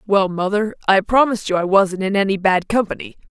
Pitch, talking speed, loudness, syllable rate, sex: 200 Hz, 200 wpm, -17 LUFS, 5.8 syllables/s, female